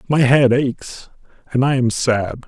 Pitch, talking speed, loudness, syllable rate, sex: 130 Hz, 170 wpm, -17 LUFS, 4.6 syllables/s, male